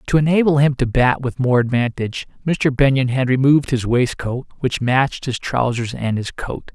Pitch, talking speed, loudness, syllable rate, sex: 130 Hz, 185 wpm, -18 LUFS, 5.1 syllables/s, male